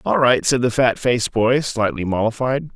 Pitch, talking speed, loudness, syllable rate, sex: 120 Hz, 195 wpm, -18 LUFS, 4.9 syllables/s, male